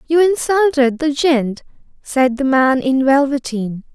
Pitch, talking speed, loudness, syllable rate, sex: 275 Hz, 135 wpm, -16 LUFS, 3.9 syllables/s, female